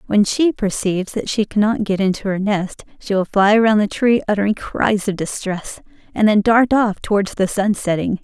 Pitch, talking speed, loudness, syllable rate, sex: 205 Hz, 205 wpm, -17 LUFS, 4.9 syllables/s, female